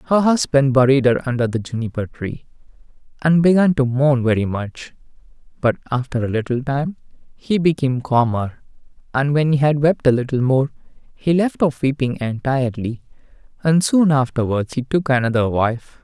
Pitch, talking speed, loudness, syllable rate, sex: 135 Hz, 155 wpm, -18 LUFS, 5.1 syllables/s, male